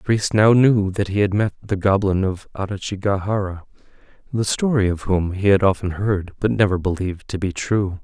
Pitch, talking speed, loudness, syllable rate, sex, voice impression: 100 Hz, 195 wpm, -20 LUFS, 5.2 syllables/s, male, masculine, adult-like, relaxed, weak, dark, calm, slightly mature, reassuring, wild, kind, modest